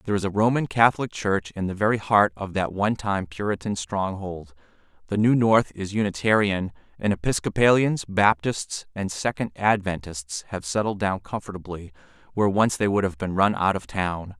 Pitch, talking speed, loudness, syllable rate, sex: 100 Hz, 165 wpm, -24 LUFS, 5.1 syllables/s, male